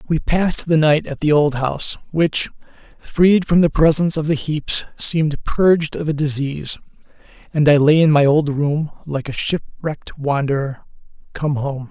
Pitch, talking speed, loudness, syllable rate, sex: 150 Hz, 170 wpm, -18 LUFS, 4.8 syllables/s, male